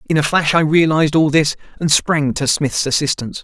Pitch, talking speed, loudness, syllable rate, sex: 150 Hz, 210 wpm, -15 LUFS, 5.7 syllables/s, male